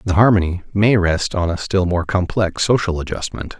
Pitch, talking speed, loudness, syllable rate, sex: 95 Hz, 185 wpm, -18 LUFS, 5.1 syllables/s, male